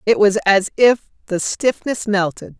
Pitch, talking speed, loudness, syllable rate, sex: 210 Hz, 160 wpm, -17 LUFS, 4.4 syllables/s, female